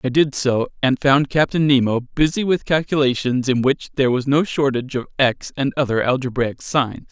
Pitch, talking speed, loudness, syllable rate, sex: 135 Hz, 185 wpm, -19 LUFS, 5.2 syllables/s, male